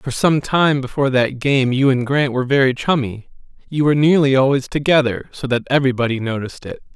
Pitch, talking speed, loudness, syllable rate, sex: 135 Hz, 190 wpm, -17 LUFS, 6.0 syllables/s, male